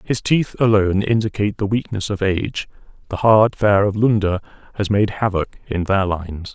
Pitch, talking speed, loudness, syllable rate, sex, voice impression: 100 Hz, 175 wpm, -18 LUFS, 5.2 syllables/s, male, very masculine, slightly old, very thick, tensed, powerful, slightly dark, soft, slightly muffled, fluent, slightly raspy, very cool, intellectual, slightly refreshing, sincere, calm, mature, very friendly, very reassuring, very unique, elegant, very wild, very sweet, lively, kind